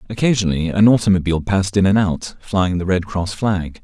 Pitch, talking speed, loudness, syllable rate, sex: 95 Hz, 190 wpm, -17 LUFS, 5.8 syllables/s, male